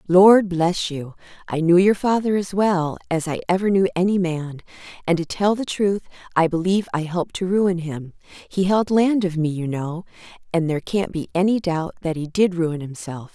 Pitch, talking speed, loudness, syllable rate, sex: 175 Hz, 200 wpm, -21 LUFS, 5.0 syllables/s, female